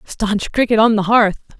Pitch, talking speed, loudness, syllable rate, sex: 215 Hz, 190 wpm, -15 LUFS, 4.0 syllables/s, female